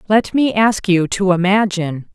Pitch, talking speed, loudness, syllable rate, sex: 195 Hz, 170 wpm, -16 LUFS, 4.6 syllables/s, female